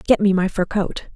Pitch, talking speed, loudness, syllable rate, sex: 190 Hz, 260 wpm, -20 LUFS, 4.9 syllables/s, female